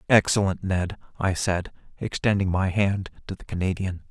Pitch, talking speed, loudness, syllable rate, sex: 95 Hz, 145 wpm, -25 LUFS, 4.9 syllables/s, male